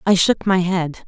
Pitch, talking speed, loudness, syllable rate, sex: 185 Hz, 225 wpm, -18 LUFS, 4.6 syllables/s, female